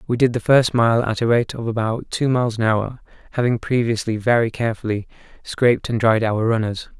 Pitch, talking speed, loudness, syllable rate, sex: 115 Hz, 195 wpm, -19 LUFS, 5.6 syllables/s, male